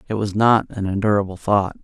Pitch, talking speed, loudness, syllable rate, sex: 105 Hz, 195 wpm, -19 LUFS, 5.6 syllables/s, male